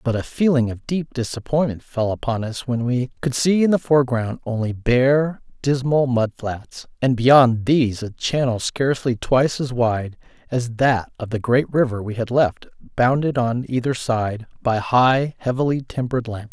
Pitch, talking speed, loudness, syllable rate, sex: 125 Hz, 175 wpm, -20 LUFS, 4.6 syllables/s, male